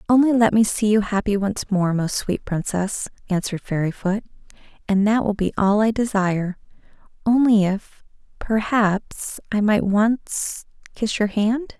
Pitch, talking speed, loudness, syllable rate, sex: 210 Hz, 135 wpm, -21 LUFS, 4.3 syllables/s, female